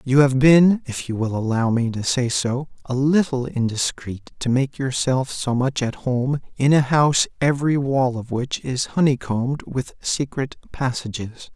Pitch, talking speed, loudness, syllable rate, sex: 130 Hz, 170 wpm, -21 LUFS, 4.5 syllables/s, male